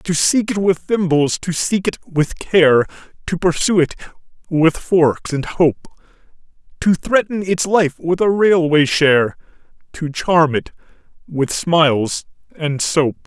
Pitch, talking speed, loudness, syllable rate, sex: 165 Hz, 145 wpm, -16 LUFS, 3.8 syllables/s, male